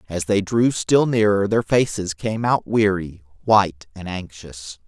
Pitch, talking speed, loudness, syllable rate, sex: 100 Hz, 160 wpm, -20 LUFS, 4.1 syllables/s, male